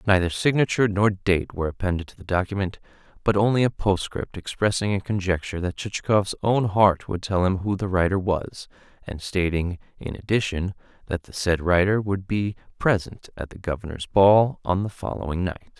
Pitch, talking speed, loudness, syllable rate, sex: 95 Hz, 175 wpm, -23 LUFS, 5.4 syllables/s, male